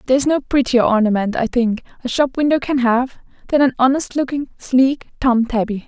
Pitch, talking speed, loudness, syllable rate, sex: 255 Hz, 195 wpm, -17 LUFS, 5.4 syllables/s, female